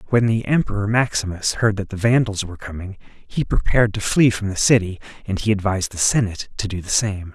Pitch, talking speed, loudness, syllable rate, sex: 105 Hz, 210 wpm, -20 LUFS, 6.0 syllables/s, male